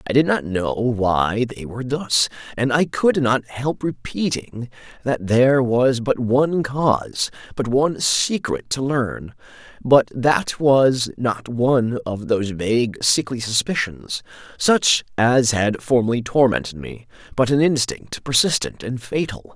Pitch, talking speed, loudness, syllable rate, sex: 125 Hz, 145 wpm, -20 LUFS, 4.1 syllables/s, male